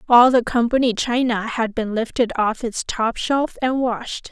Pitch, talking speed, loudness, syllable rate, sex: 235 Hz, 180 wpm, -20 LUFS, 4.2 syllables/s, female